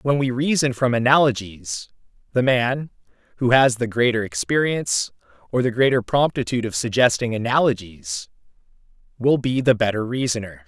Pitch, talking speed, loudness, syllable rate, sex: 120 Hz, 135 wpm, -20 LUFS, 5.2 syllables/s, male